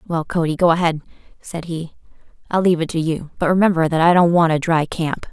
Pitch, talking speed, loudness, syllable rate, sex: 165 Hz, 225 wpm, -18 LUFS, 6.0 syllables/s, female